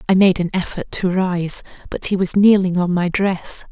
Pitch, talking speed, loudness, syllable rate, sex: 185 Hz, 210 wpm, -18 LUFS, 4.7 syllables/s, female